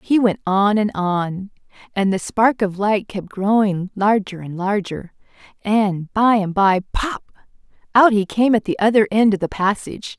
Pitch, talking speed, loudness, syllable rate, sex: 205 Hz, 170 wpm, -18 LUFS, 4.4 syllables/s, female